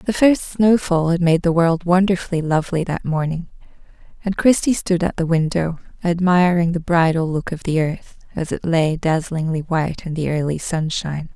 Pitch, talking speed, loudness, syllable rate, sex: 170 Hz, 180 wpm, -19 LUFS, 5.0 syllables/s, female